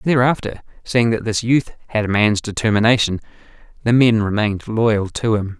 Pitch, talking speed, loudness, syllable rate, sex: 110 Hz, 160 wpm, -18 LUFS, 5.1 syllables/s, male